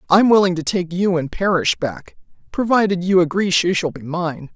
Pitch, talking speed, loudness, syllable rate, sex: 180 Hz, 200 wpm, -18 LUFS, 5.0 syllables/s, female